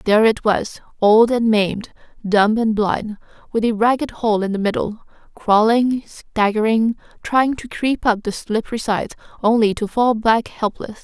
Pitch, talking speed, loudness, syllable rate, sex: 220 Hz, 165 wpm, -18 LUFS, 4.5 syllables/s, female